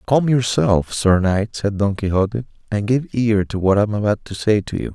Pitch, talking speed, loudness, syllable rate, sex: 105 Hz, 230 wpm, -19 LUFS, 5.1 syllables/s, male